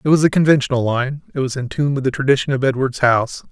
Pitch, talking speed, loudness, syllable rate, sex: 135 Hz, 255 wpm, -17 LUFS, 6.8 syllables/s, male